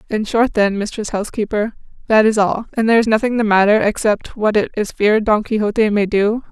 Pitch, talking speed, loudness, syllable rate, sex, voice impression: 215 Hz, 210 wpm, -16 LUFS, 5.9 syllables/s, female, feminine, adult-like, tensed, slightly powerful, slightly bright, clear, fluent, intellectual, calm, reassuring, slightly kind, modest